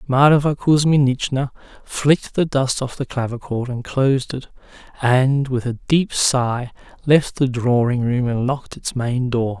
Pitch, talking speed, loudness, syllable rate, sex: 130 Hz, 155 wpm, -19 LUFS, 4.2 syllables/s, male